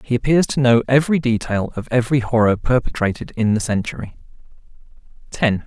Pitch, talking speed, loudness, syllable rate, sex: 120 Hz, 150 wpm, -18 LUFS, 6.0 syllables/s, male